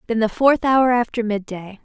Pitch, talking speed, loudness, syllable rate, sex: 230 Hz, 195 wpm, -18 LUFS, 4.9 syllables/s, female